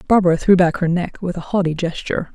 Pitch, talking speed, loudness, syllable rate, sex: 175 Hz, 230 wpm, -18 LUFS, 6.5 syllables/s, female